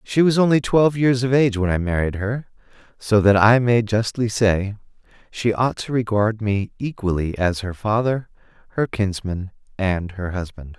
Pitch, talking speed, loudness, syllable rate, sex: 110 Hz, 170 wpm, -20 LUFS, 4.7 syllables/s, male